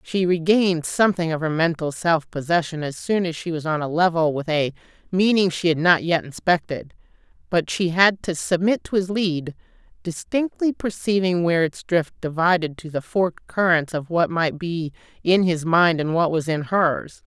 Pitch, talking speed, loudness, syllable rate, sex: 170 Hz, 185 wpm, -21 LUFS, 4.9 syllables/s, female